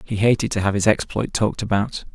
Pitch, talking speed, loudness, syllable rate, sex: 105 Hz, 225 wpm, -21 LUFS, 6.0 syllables/s, male